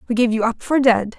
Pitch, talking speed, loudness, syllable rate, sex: 235 Hz, 305 wpm, -18 LUFS, 5.9 syllables/s, female